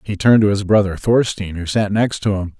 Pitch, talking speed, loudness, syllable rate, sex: 100 Hz, 255 wpm, -17 LUFS, 5.6 syllables/s, male